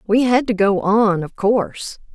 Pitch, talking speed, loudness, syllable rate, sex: 210 Hz, 195 wpm, -17 LUFS, 4.3 syllables/s, female